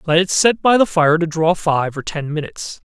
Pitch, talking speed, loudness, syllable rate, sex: 165 Hz, 245 wpm, -16 LUFS, 5.1 syllables/s, male